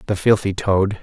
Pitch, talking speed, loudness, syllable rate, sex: 100 Hz, 175 wpm, -18 LUFS, 4.7 syllables/s, male